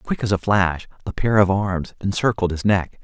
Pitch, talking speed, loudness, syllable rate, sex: 95 Hz, 215 wpm, -20 LUFS, 4.9 syllables/s, male